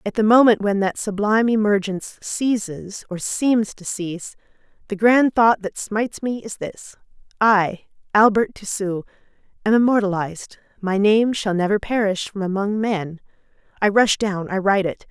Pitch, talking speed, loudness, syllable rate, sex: 205 Hz, 155 wpm, -20 LUFS, 4.7 syllables/s, female